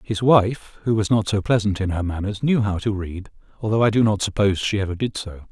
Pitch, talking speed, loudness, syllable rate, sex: 105 Hz, 250 wpm, -21 LUFS, 5.8 syllables/s, male